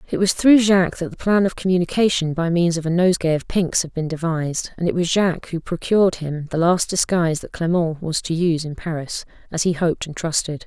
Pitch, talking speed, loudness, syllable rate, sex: 170 Hz, 225 wpm, -20 LUFS, 5.9 syllables/s, female